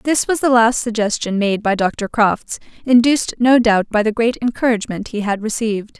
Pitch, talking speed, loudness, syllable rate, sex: 225 Hz, 190 wpm, -16 LUFS, 5.1 syllables/s, female